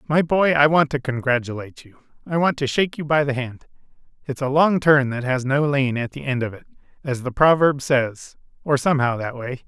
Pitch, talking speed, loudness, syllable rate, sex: 140 Hz, 225 wpm, -20 LUFS, 5.4 syllables/s, male